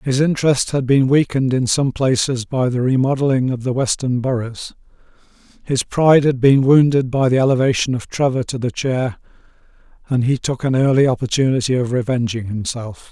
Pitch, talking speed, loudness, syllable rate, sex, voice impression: 130 Hz, 170 wpm, -17 LUFS, 5.4 syllables/s, male, masculine, adult-like, tensed, slightly weak, soft, raspy, calm, friendly, reassuring, slightly unique, kind, modest